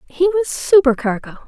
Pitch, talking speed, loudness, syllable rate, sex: 310 Hz, 120 wpm, -16 LUFS, 5.1 syllables/s, female